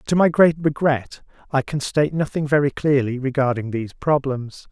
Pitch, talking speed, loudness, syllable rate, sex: 140 Hz, 165 wpm, -20 LUFS, 4.9 syllables/s, male